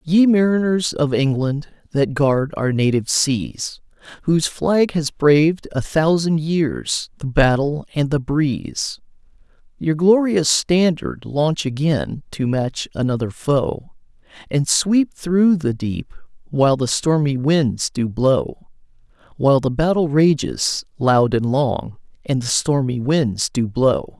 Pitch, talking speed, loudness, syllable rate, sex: 145 Hz, 135 wpm, -19 LUFS, 3.7 syllables/s, male